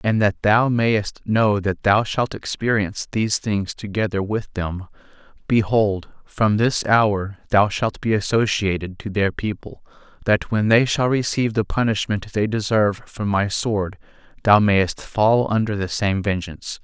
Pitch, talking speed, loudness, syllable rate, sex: 105 Hz, 155 wpm, -20 LUFS, 4.3 syllables/s, male